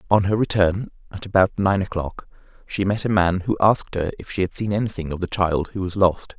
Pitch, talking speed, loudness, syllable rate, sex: 95 Hz, 235 wpm, -21 LUFS, 5.8 syllables/s, male